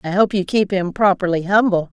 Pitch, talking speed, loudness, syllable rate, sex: 190 Hz, 210 wpm, -17 LUFS, 5.5 syllables/s, female